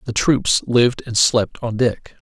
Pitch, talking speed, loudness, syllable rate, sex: 120 Hz, 180 wpm, -18 LUFS, 4.0 syllables/s, male